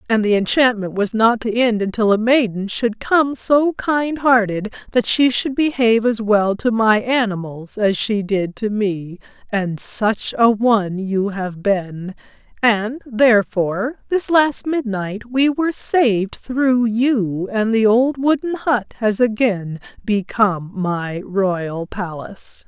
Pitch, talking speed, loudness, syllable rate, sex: 220 Hz, 150 wpm, -18 LUFS, 3.8 syllables/s, female